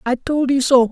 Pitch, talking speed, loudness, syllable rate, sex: 260 Hz, 265 wpm, -17 LUFS, 5.1 syllables/s, male